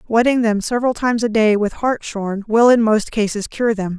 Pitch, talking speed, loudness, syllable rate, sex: 220 Hz, 210 wpm, -17 LUFS, 5.3 syllables/s, female